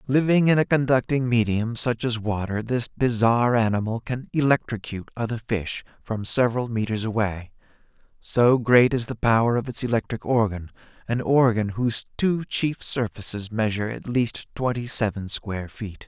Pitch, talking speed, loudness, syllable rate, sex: 115 Hz, 155 wpm, -23 LUFS, 5.0 syllables/s, male